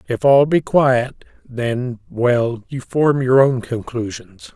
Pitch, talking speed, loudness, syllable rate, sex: 125 Hz, 130 wpm, -17 LUFS, 3.2 syllables/s, male